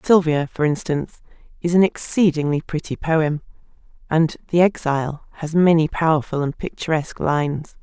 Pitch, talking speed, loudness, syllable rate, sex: 160 Hz, 130 wpm, -20 LUFS, 5.3 syllables/s, female